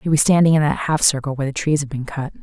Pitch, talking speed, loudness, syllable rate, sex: 145 Hz, 320 wpm, -18 LUFS, 6.9 syllables/s, female